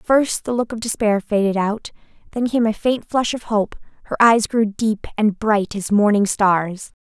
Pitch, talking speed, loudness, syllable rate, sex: 215 Hz, 195 wpm, -19 LUFS, 4.3 syllables/s, female